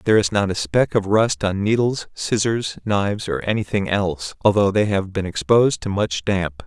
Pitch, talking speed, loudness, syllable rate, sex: 100 Hz, 200 wpm, -20 LUFS, 5.0 syllables/s, male